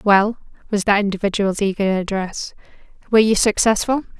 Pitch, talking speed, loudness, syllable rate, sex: 205 Hz, 130 wpm, -18 LUFS, 5.5 syllables/s, female